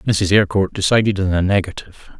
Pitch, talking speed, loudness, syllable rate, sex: 100 Hz, 165 wpm, -16 LUFS, 6.2 syllables/s, male